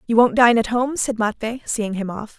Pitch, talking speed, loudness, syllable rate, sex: 225 Hz, 250 wpm, -19 LUFS, 5.0 syllables/s, female